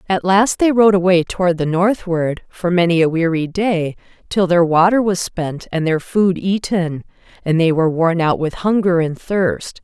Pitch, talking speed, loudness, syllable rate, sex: 180 Hz, 190 wpm, -16 LUFS, 4.6 syllables/s, female